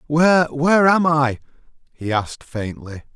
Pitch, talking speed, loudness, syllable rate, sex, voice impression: 145 Hz, 115 wpm, -18 LUFS, 4.7 syllables/s, male, masculine, adult-like, slightly thick, slightly cool, slightly refreshing, sincere